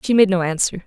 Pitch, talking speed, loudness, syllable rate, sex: 190 Hz, 280 wpm, -18 LUFS, 6.5 syllables/s, female